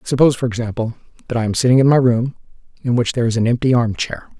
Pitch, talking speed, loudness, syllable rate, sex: 120 Hz, 245 wpm, -17 LUFS, 7.2 syllables/s, male